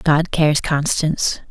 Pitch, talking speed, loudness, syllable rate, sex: 155 Hz, 120 wpm, -18 LUFS, 4.3 syllables/s, female